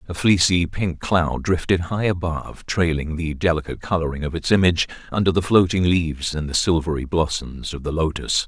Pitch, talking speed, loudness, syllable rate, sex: 85 Hz, 175 wpm, -21 LUFS, 5.5 syllables/s, male